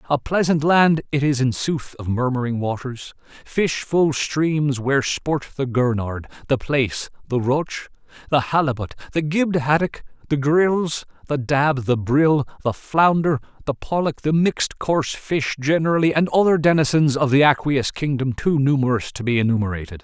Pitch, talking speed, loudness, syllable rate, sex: 140 Hz, 155 wpm, -20 LUFS, 4.8 syllables/s, male